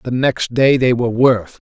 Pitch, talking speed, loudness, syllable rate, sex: 125 Hz, 210 wpm, -15 LUFS, 5.4 syllables/s, male